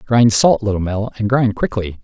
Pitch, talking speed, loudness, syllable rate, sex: 110 Hz, 205 wpm, -16 LUFS, 4.9 syllables/s, male